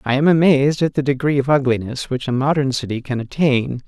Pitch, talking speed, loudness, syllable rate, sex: 135 Hz, 215 wpm, -18 LUFS, 5.9 syllables/s, male